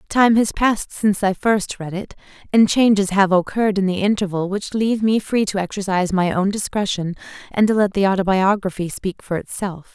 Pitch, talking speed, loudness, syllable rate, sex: 200 Hz, 195 wpm, -19 LUFS, 5.6 syllables/s, female